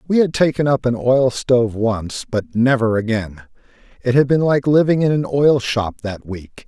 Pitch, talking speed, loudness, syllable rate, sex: 125 Hz, 200 wpm, -17 LUFS, 4.6 syllables/s, male